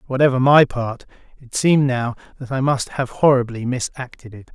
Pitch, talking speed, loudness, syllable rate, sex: 130 Hz, 170 wpm, -18 LUFS, 5.3 syllables/s, male